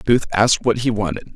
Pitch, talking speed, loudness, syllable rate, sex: 110 Hz, 220 wpm, -18 LUFS, 6.1 syllables/s, male